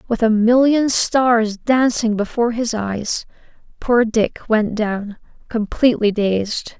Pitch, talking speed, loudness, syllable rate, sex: 225 Hz, 125 wpm, -17 LUFS, 3.7 syllables/s, female